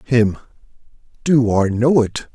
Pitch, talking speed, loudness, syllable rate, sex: 120 Hz, 130 wpm, -17 LUFS, 3.7 syllables/s, male